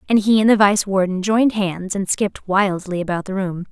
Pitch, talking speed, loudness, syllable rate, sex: 195 Hz, 225 wpm, -18 LUFS, 5.4 syllables/s, female